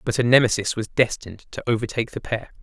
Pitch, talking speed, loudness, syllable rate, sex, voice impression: 115 Hz, 205 wpm, -22 LUFS, 6.7 syllables/s, male, very masculine, adult-like, slightly thick, very tensed, powerful, bright, slightly hard, clear, very fluent, slightly raspy, cool, intellectual, very refreshing, slightly sincere, slightly calm, slightly mature, friendly, reassuring, very unique, elegant, slightly wild, sweet, lively, kind, slightly intense, slightly sharp